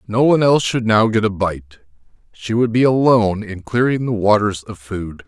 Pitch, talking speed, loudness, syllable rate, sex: 110 Hz, 205 wpm, -17 LUFS, 5.2 syllables/s, male